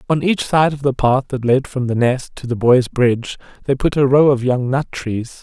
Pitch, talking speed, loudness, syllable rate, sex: 130 Hz, 255 wpm, -17 LUFS, 4.9 syllables/s, male